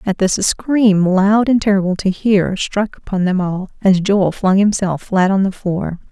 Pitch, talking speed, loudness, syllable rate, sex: 195 Hz, 205 wpm, -15 LUFS, 4.3 syllables/s, female